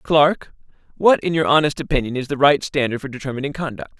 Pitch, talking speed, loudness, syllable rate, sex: 145 Hz, 195 wpm, -19 LUFS, 6.1 syllables/s, male